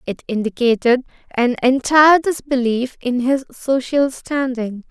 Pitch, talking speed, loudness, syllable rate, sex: 255 Hz, 110 wpm, -17 LUFS, 4.2 syllables/s, female